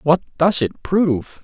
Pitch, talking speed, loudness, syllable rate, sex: 160 Hz, 165 wpm, -18 LUFS, 4.4 syllables/s, male